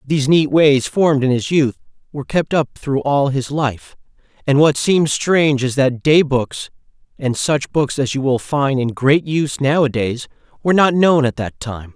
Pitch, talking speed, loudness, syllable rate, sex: 140 Hz, 205 wpm, -16 LUFS, 4.6 syllables/s, male